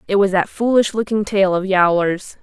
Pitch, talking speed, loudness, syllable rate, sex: 195 Hz, 200 wpm, -17 LUFS, 4.9 syllables/s, female